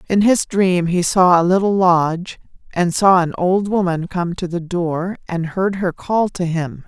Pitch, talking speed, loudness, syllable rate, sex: 180 Hz, 200 wpm, -17 LUFS, 4.2 syllables/s, female